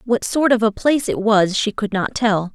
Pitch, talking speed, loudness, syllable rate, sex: 220 Hz, 260 wpm, -18 LUFS, 5.0 syllables/s, female